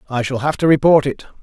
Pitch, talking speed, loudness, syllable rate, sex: 140 Hz, 250 wpm, -16 LUFS, 6.4 syllables/s, male